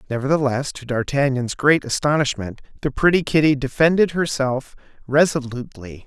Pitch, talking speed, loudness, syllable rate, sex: 135 Hz, 110 wpm, -19 LUFS, 5.2 syllables/s, male